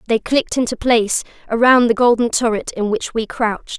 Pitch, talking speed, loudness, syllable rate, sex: 230 Hz, 190 wpm, -17 LUFS, 5.7 syllables/s, female